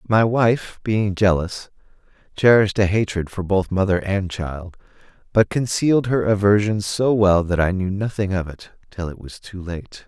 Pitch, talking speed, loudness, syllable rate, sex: 100 Hz, 175 wpm, -20 LUFS, 4.5 syllables/s, male